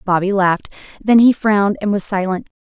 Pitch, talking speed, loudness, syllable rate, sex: 200 Hz, 185 wpm, -15 LUFS, 5.7 syllables/s, female